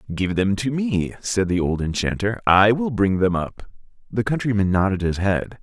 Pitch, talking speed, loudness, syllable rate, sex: 105 Hz, 190 wpm, -21 LUFS, 4.8 syllables/s, male